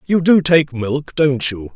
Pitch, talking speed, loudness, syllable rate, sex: 140 Hz, 205 wpm, -16 LUFS, 3.8 syllables/s, male